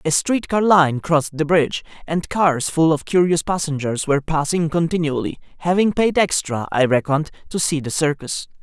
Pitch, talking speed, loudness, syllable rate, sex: 160 Hz, 175 wpm, -19 LUFS, 5.2 syllables/s, male